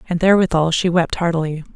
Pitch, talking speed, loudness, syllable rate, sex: 170 Hz, 170 wpm, -17 LUFS, 6.6 syllables/s, female